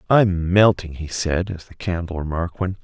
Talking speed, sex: 190 wpm, male